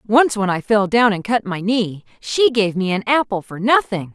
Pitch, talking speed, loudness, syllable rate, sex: 210 Hz, 230 wpm, -18 LUFS, 4.6 syllables/s, female